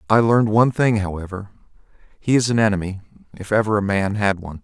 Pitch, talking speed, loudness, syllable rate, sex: 105 Hz, 180 wpm, -19 LUFS, 6.5 syllables/s, male